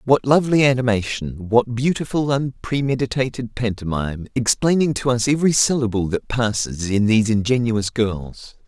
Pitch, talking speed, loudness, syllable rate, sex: 120 Hz, 125 wpm, -19 LUFS, 5.1 syllables/s, male